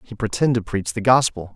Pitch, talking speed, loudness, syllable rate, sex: 110 Hz, 230 wpm, -20 LUFS, 5.5 syllables/s, male